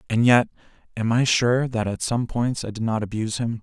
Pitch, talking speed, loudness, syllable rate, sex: 115 Hz, 230 wpm, -22 LUFS, 5.4 syllables/s, male